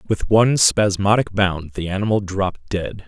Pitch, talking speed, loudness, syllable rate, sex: 100 Hz, 155 wpm, -19 LUFS, 5.1 syllables/s, male